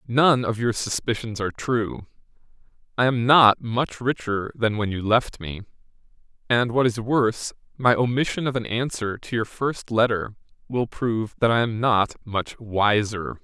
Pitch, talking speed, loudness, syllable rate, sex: 115 Hz, 165 wpm, -23 LUFS, 4.5 syllables/s, male